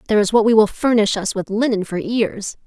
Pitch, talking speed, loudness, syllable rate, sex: 215 Hz, 225 wpm, -17 LUFS, 5.4 syllables/s, female